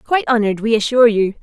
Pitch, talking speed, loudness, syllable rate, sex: 225 Hz, 210 wpm, -15 LUFS, 7.8 syllables/s, female